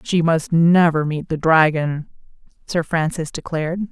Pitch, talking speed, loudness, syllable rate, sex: 165 Hz, 140 wpm, -18 LUFS, 4.3 syllables/s, female